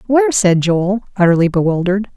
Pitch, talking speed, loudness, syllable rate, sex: 185 Hz, 140 wpm, -14 LUFS, 5.8 syllables/s, female